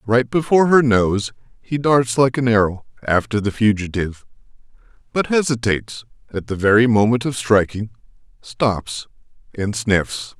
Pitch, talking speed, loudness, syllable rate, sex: 115 Hz, 135 wpm, -18 LUFS, 4.7 syllables/s, male